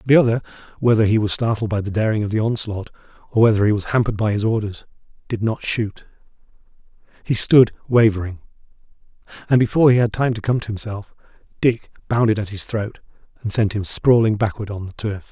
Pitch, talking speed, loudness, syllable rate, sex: 110 Hz, 190 wpm, -19 LUFS, 6.2 syllables/s, male